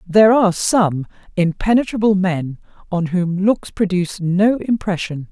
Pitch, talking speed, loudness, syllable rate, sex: 190 Hz, 125 wpm, -17 LUFS, 4.6 syllables/s, female